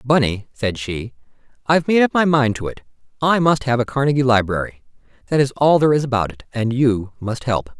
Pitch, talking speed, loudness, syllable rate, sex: 130 Hz, 200 wpm, -18 LUFS, 5.8 syllables/s, male